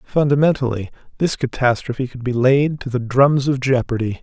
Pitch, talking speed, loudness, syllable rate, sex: 130 Hz, 155 wpm, -18 LUFS, 5.2 syllables/s, male